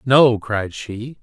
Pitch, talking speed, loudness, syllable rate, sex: 115 Hz, 145 wpm, -18 LUFS, 2.7 syllables/s, male